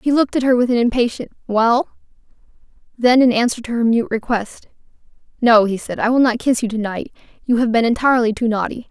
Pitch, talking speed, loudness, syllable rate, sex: 235 Hz, 210 wpm, -17 LUFS, 6.1 syllables/s, female